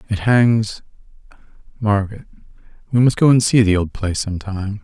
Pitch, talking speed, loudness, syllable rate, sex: 105 Hz, 150 wpm, -17 LUFS, 5.3 syllables/s, male